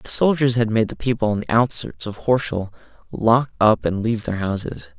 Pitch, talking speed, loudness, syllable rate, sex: 115 Hz, 205 wpm, -20 LUFS, 5.2 syllables/s, male